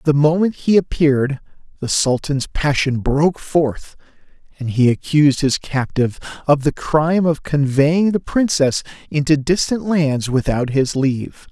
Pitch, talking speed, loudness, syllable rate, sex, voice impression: 150 Hz, 140 wpm, -17 LUFS, 4.5 syllables/s, male, masculine, adult-like, slightly cool, slightly friendly, slightly unique